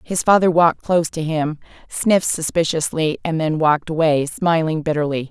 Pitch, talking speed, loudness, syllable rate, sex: 160 Hz, 160 wpm, -18 LUFS, 5.4 syllables/s, female